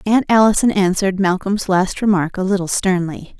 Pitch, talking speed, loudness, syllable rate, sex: 190 Hz, 160 wpm, -16 LUFS, 5.3 syllables/s, female